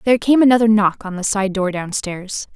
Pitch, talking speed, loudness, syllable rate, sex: 205 Hz, 210 wpm, -17 LUFS, 5.4 syllables/s, female